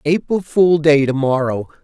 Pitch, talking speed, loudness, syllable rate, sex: 150 Hz, 130 wpm, -16 LUFS, 4.3 syllables/s, male